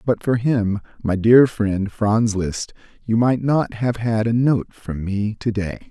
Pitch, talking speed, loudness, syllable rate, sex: 110 Hz, 195 wpm, -20 LUFS, 3.7 syllables/s, male